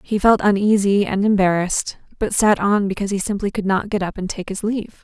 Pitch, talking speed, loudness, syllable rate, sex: 200 Hz, 225 wpm, -19 LUFS, 5.9 syllables/s, female